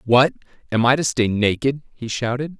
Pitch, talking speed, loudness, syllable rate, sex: 125 Hz, 185 wpm, -20 LUFS, 5.1 syllables/s, male